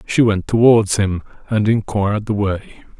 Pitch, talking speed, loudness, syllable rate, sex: 105 Hz, 160 wpm, -17 LUFS, 4.4 syllables/s, male